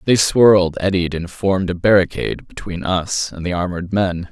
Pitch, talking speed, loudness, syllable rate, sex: 90 Hz, 180 wpm, -17 LUFS, 5.3 syllables/s, male